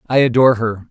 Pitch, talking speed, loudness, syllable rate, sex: 120 Hz, 200 wpm, -14 LUFS, 6.5 syllables/s, male